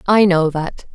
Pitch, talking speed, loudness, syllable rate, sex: 180 Hz, 190 wpm, -16 LUFS, 3.9 syllables/s, female